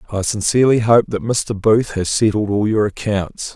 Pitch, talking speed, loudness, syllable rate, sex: 105 Hz, 185 wpm, -17 LUFS, 4.8 syllables/s, male